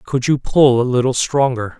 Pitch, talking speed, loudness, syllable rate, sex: 130 Hz, 200 wpm, -16 LUFS, 4.6 syllables/s, male